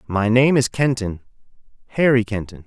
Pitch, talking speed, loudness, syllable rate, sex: 115 Hz, 135 wpm, -19 LUFS, 5.1 syllables/s, male